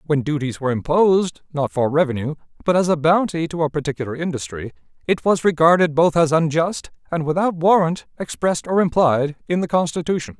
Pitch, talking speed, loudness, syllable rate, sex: 160 Hz, 175 wpm, -19 LUFS, 5.8 syllables/s, male